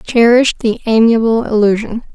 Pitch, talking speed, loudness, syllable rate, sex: 225 Hz, 110 wpm, -12 LUFS, 5.5 syllables/s, female